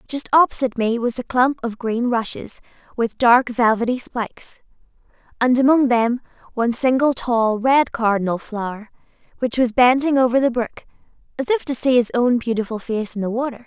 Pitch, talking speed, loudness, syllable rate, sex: 240 Hz, 170 wpm, -19 LUFS, 5.2 syllables/s, female